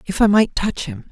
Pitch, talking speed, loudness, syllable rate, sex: 200 Hz, 270 wpm, -17 LUFS, 5.1 syllables/s, female